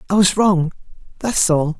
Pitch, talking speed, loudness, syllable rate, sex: 185 Hz, 170 wpm, -17 LUFS, 4.6 syllables/s, male